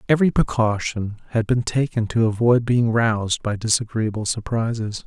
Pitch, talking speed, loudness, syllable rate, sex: 115 Hz, 140 wpm, -21 LUFS, 5.1 syllables/s, male